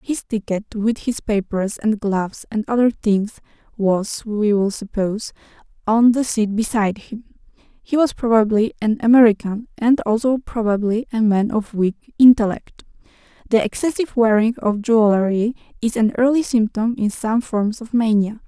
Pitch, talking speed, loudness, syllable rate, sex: 220 Hz, 150 wpm, -18 LUFS, 4.8 syllables/s, female